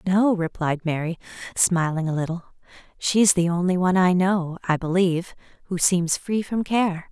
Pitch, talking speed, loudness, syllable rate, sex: 180 Hz, 160 wpm, -22 LUFS, 4.8 syllables/s, female